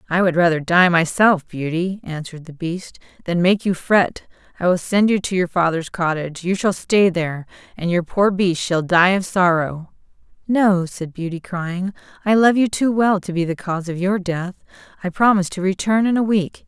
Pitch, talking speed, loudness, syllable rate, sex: 180 Hz, 200 wpm, -19 LUFS, 5.0 syllables/s, female